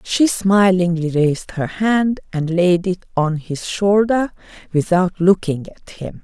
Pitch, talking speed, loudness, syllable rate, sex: 180 Hz, 145 wpm, -17 LUFS, 3.9 syllables/s, female